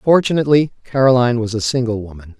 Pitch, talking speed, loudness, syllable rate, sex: 120 Hz, 150 wpm, -16 LUFS, 6.9 syllables/s, male